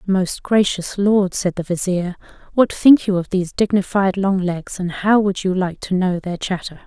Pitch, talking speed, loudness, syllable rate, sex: 190 Hz, 200 wpm, -18 LUFS, 4.6 syllables/s, female